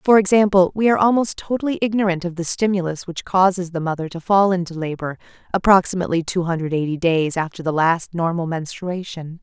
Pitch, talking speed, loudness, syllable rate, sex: 180 Hz, 180 wpm, -19 LUFS, 5.9 syllables/s, female